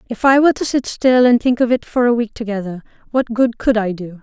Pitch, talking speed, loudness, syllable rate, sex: 235 Hz, 270 wpm, -16 LUFS, 5.9 syllables/s, female